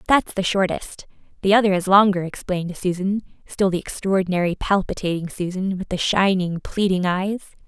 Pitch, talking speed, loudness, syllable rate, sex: 190 Hz, 140 wpm, -21 LUFS, 5.3 syllables/s, female